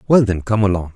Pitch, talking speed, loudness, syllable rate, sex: 100 Hz, 250 wpm, -17 LUFS, 6.3 syllables/s, male